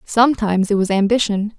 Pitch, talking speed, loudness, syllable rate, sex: 210 Hz, 150 wpm, -17 LUFS, 6.1 syllables/s, female